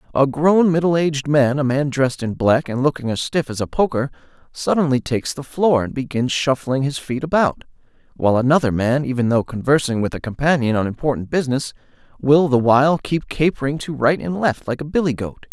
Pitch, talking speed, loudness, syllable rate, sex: 135 Hz, 195 wpm, -19 LUFS, 5.7 syllables/s, male